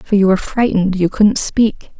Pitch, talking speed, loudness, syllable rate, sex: 200 Hz, 210 wpm, -15 LUFS, 5.3 syllables/s, female